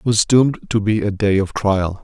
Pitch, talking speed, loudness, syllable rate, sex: 105 Hz, 265 wpm, -17 LUFS, 5.3 syllables/s, male